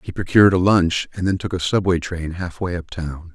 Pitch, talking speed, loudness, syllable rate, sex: 90 Hz, 215 wpm, -20 LUFS, 5.4 syllables/s, male